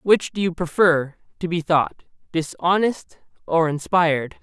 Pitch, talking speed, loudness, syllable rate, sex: 170 Hz, 135 wpm, -21 LUFS, 4.1 syllables/s, male